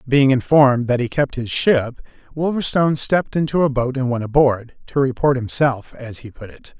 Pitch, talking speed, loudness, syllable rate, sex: 130 Hz, 195 wpm, -18 LUFS, 5.1 syllables/s, male